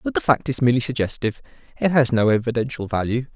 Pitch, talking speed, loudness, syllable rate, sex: 120 Hz, 195 wpm, -21 LUFS, 7.1 syllables/s, male